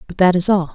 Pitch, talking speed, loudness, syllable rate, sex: 185 Hz, 325 wpm, -16 LUFS, 6.8 syllables/s, female